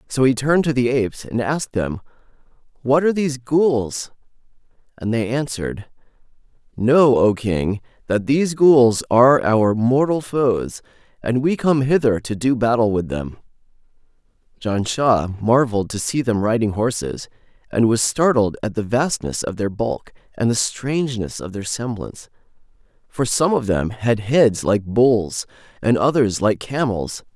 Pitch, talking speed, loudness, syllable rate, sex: 120 Hz, 150 wpm, -19 LUFS, 4.5 syllables/s, male